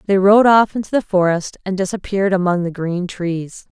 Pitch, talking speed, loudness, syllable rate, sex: 190 Hz, 190 wpm, -17 LUFS, 5.2 syllables/s, female